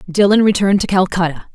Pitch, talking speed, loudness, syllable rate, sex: 190 Hz, 155 wpm, -14 LUFS, 6.6 syllables/s, female